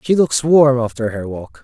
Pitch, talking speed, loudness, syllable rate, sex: 120 Hz, 220 wpm, -15 LUFS, 4.6 syllables/s, male